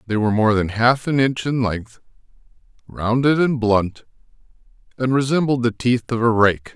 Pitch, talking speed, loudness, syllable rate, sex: 120 Hz, 170 wpm, -19 LUFS, 4.8 syllables/s, male